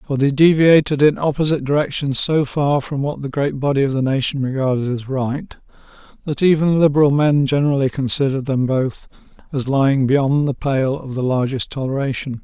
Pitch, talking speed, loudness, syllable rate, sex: 140 Hz, 175 wpm, -18 LUFS, 5.5 syllables/s, male